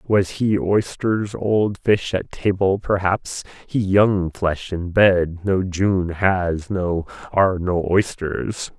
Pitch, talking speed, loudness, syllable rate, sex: 95 Hz, 135 wpm, -20 LUFS, 2.9 syllables/s, male